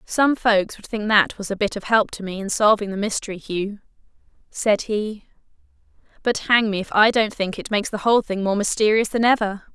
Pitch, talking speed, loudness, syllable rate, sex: 210 Hz, 215 wpm, -21 LUFS, 5.4 syllables/s, female